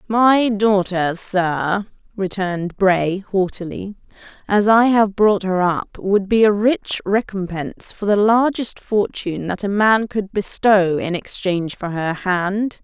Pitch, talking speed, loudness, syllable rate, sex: 195 Hz, 145 wpm, -18 LUFS, 3.9 syllables/s, female